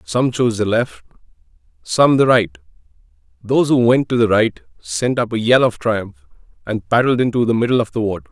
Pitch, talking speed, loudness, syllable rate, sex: 120 Hz, 195 wpm, -17 LUFS, 5.4 syllables/s, male